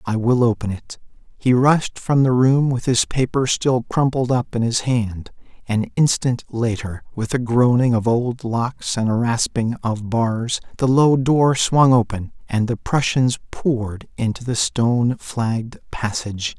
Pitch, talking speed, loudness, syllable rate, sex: 120 Hz, 165 wpm, -19 LUFS, 4.1 syllables/s, male